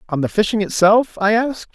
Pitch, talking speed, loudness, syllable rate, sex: 210 Hz, 205 wpm, -17 LUFS, 5.8 syllables/s, male